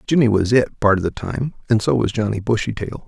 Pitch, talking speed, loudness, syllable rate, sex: 110 Hz, 235 wpm, -19 LUFS, 5.8 syllables/s, male